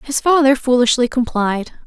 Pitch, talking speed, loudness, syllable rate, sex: 255 Hz, 130 wpm, -15 LUFS, 4.9 syllables/s, female